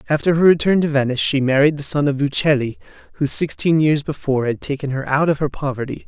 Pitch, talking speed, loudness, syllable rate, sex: 145 Hz, 225 wpm, -18 LUFS, 6.6 syllables/s, male